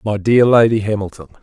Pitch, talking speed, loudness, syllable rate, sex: 105 Hz, 170 wpm, -14 LUFS, 5.8 syllables/s, male